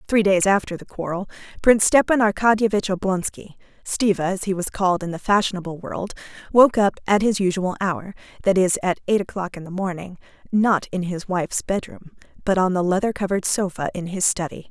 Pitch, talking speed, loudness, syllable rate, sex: 190 Hz, 180 wpm, -21 LUFS, 5.7 syllables/s, female